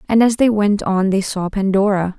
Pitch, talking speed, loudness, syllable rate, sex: 200 Hz, 220 wpm, -16 LUFS, 5.0 syllables/s, female